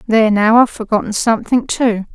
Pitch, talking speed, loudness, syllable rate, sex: 225 Hz, 170 wpm, -14 LUFS, 6.2 syllables/s, female